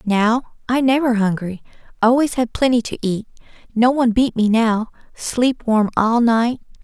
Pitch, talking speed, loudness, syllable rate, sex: 230 Hz, 160 wpm, -18 LUFS, 4.4 syllables/s, female